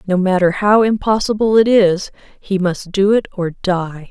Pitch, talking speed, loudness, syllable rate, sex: 195 Hz, 175 wpm, -15 LUFS, 4.3 syllables/s, female